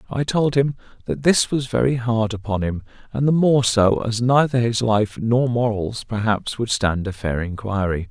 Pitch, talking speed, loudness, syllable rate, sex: 115 Hz, 190 wpm, -20 LUFS, 4.6 syllables/s, male